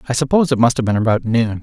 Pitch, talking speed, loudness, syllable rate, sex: 120 Hz, 295 wpm, -16 LUFS, 7.6 syllables/s, male